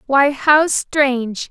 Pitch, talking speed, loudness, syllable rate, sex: 275 Hz, 120 wpm, -15 LUFS, 3.0 syllables/s, female